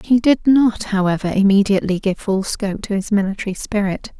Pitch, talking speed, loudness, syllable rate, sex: 205 Hz, 170 wpm, -18 LUFS, 5.8 syllables/s, female